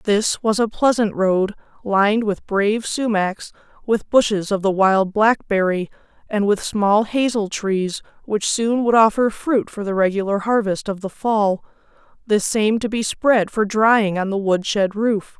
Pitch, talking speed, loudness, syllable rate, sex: 210 Hz, 170 wpm, -19 LUFS, 4.2 syllables/s, female